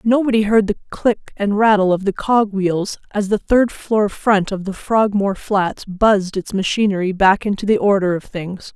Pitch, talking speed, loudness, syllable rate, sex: 200 Hz, 190 wpm, -17 LUFS, 4.7 syllables/s, female